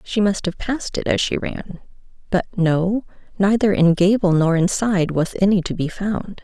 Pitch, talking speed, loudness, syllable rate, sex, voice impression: 190 Hz, 175 wpm, -19 LUFS, 4.7 syllables/s, female, very feminine, slightly middle-aged, slightly thin, tensed, slightly weak, bright, soft, slightly clear, fluent, slightly raspy, cool, very intellectual, refreshing, sincere, very calm, very friendly, very reassuring, unique, very elegant, slightly wild, very sweet, lively, very kind, modest, slightly light